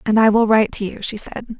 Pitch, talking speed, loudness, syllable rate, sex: 215 Hz, 300 wpm, -18 LUFS, 6.3 syllables/s, female